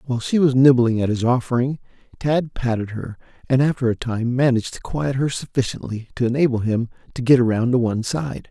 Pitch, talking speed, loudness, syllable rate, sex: 125 Hz, 200 wpm, -20 LUFS, 5.8 syllables/s, male